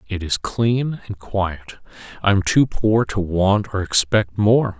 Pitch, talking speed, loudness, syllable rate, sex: 105 Hz, 175 wpm, -19 LUFS, 3.8 syllables/s, male